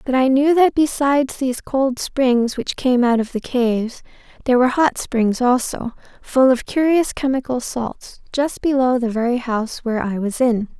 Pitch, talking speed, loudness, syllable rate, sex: 255 Hz, 185 wpm, -18 LUFS, 4.8 syllables/s, female